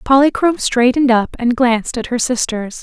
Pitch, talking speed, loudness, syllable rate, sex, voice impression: 245 Hz, 170 wpm, -15 LUFS, 5.5 syllables/s, female, very feminine, young, thin, tensed, slightly powerful, bright, soft, clear, fluent, slightly raspy, very cute, intellectual, very refreshing, sincere, calm, very friendly, very reassuring, very unique, elegant, wild, very sweet, lively, kind, modest, light